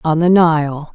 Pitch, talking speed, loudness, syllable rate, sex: 160 Hz, 190 wpm, -14 LUFS, 3.6 syllables/s, female